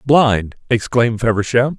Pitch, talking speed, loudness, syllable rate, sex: 120 Hz, 100 wpm, -16 LUFS, 4.6 syllables/s, male